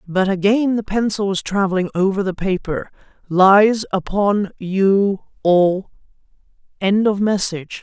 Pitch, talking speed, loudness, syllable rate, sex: 195 Hz, 115 wpm, -18 LUFS, 4.2 syllables/s, female